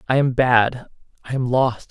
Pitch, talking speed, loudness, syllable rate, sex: 125 Hz, 190 wpm, -19 LUFS, 4.4 syllables/s, male